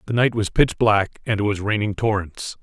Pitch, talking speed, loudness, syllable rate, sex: 105 Hz, 230 wpm, -21 LUFS, 5.0 syllables/s, male